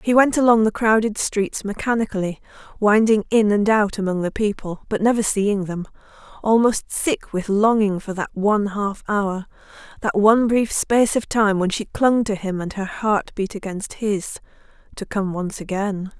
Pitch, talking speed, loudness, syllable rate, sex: 205 Hz, 165 wpm, -20 LUFS, 4.8 syllables/s, female